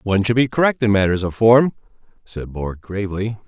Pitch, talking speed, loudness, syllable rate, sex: 105 Hz, 190 wpm, -18 LUFS, 5.7 syllables/s, male